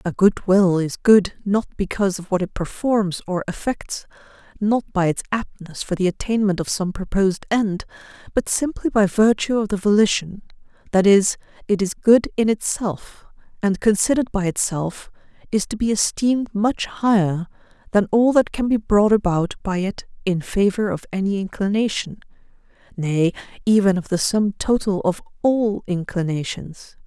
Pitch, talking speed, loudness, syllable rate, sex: 200 Hz, 155 wpm, -20 LUFS, 4.8 syllables/s, female